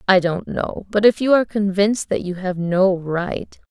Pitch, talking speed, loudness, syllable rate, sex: 195 Hz, 210 wpm, -19 LUFS, 4.7 syllables/s, female